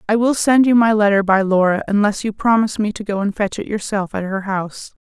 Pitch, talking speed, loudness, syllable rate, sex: 205 Hz, 250 wpm, -17 LUFS, 5.9 syllables/s, female